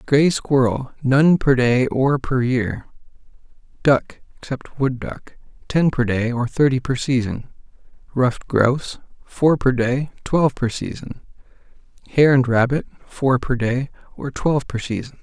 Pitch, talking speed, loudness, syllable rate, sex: 130 Hz, 145 wpm, -19 LUFS, 4.3 syllables/s, male